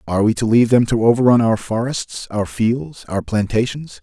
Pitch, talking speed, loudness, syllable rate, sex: 115 Hz, 195 wpm, -17 LUFS, 5.2 syllables/s, male